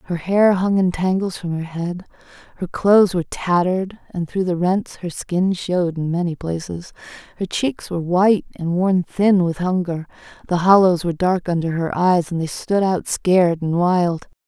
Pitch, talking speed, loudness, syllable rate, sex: 180 Hz, 185 wpm, -19 LUFS, 4.8 syllables/s, female